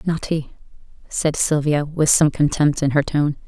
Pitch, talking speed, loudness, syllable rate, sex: 150 Hz, 175 wpm, -19 LUFS, 4.4 syllables/s, female